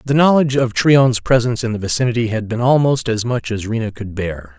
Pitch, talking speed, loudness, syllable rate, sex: 115 Hz, 225 wpm, -16 LUFS, 5.9 syllables/s, male